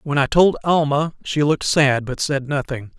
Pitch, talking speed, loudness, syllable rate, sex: 145 Hz, 200 wpm, -18 LUFS, 4.9 syllables/s, male